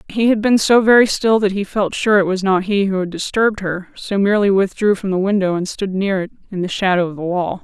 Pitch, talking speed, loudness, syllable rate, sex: 195 Hz, 265 wpm, -17 LUFS, 5.9 syllables/s, female